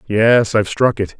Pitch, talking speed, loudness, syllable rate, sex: 105 Hz, 200 wpm, -15 LUFS, 4.9 syllables/s, male